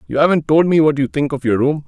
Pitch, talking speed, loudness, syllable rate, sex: 150 Hz, 320 wpm, -15 LUFS, 6.5 syllables/s, male